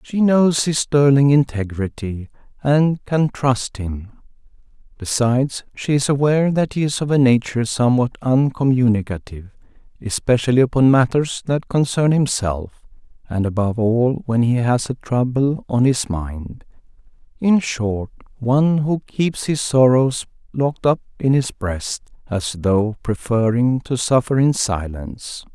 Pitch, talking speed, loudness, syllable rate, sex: 125 Hz, 130 wpm, -18 LUFS, 4.4 syllables/s, male